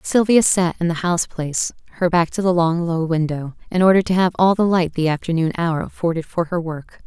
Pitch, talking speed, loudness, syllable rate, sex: 170 Hz, 230 wpm, -19 LUFS, 5.6 syllables/s, female